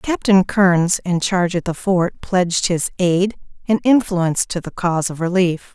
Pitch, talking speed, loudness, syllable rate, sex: 185 Hz, 180 wpm, -18 LUFS, 4.6 syllables/s, female